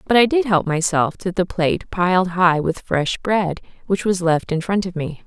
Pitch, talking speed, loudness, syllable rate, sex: 180 Hz, 230 wpm, -19 LUFS, 4.8 syllables/s, female